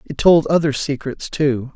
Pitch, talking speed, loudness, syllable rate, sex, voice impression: 145 Hz, 170 wpm, -18 LUFS, 4.2 syllables/s, male, masculine, adult-like, slightly tensed, slightly powerful, soft, clear, cool, intellectual, calm, friendly, lively, kind